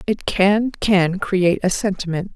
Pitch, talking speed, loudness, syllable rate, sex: 190 Hz, 155 wpm, -19 LUFS, 4.2 syllables/s, female